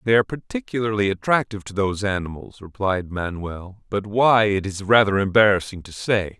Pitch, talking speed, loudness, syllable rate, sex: 100 Hz, 160 wpm, -21 LUFS, 5.5 syllables/s, male